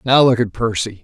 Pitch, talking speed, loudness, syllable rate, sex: 115 Hz, 235 wpm, -16 LUFS, 5.4 syllables/s, male